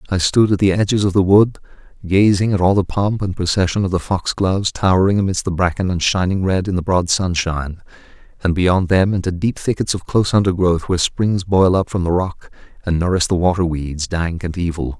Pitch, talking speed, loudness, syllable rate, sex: 90 Hz, 210 wpm, -17 LUFS, 5.6 syllables/s, male